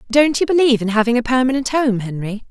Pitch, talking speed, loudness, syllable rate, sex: 245 Hz, 215 wpm, -17 LUFS, 6.6 syllables/s, female